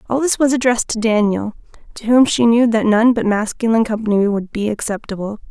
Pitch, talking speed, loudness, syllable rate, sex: 225 Hz, 195 wpm, -16 LUFS, 6.0 syllables/s, female